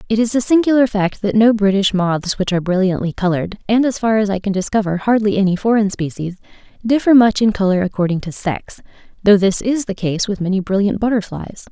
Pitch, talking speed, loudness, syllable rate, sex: 205 Hz, 205 wpm, -16 LUFS, 5.9 syllables/s, female